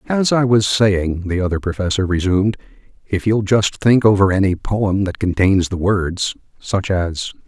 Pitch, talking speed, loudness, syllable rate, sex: 100 Hz, 160 wpm, -17 LUFS, 4.5 syllables/s, male